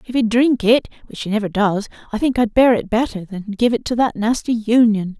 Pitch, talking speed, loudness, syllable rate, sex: 225 Hz, 245 wpm, -18 LUFS, 5.4 syllables/s, female